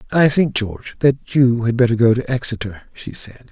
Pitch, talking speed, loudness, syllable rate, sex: 125 Hz, 205 wpm, -18 LUFS, 5.1 syllables/s, male